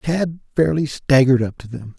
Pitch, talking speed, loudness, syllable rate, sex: 135 Hz, 180 wpm, -18 LUFS, 5.3 syllables/s, male